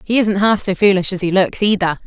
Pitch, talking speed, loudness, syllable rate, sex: 195 Hz, 260 wpm, -15 LUFS, 5.7 syllables/s, female